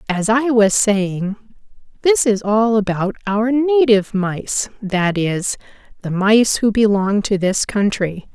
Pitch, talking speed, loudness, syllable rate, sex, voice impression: 210 Hz, 145 wpm, -17 LUFS, 3.7 syllables/s, female, feminine, adult-like, slightly bright, soft, slightly muffled, slightly intellectual, slightly calm, elegant, slightly sharp, slightly modest